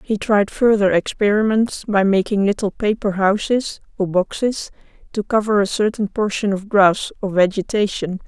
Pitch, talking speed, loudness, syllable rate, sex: 205 Hz, 145 wpm, -18 LUFS, 4.7 syllables/s, female